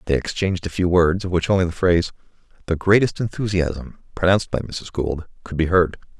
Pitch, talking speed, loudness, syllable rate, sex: 90 Hz, 195 wpm, -21 LUFS, 5.9 syllables/s, male